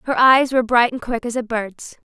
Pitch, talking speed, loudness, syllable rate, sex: 240 Hz, 255 wpm, -17 LUFS, 5.1 syllables/s, female